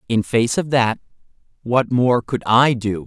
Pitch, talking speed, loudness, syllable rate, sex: 120 Hz, 175 wpm, -18 LUFS, 4.1 syllables/s, male